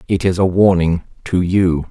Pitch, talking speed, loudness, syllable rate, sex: 90 Hz, 190 wpm, -16 LUFS, 4.5 syllables/s, male